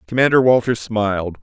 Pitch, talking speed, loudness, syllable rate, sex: 115 Hz, 125 wpm, -16 LUFS, 5.6 syllables/s, male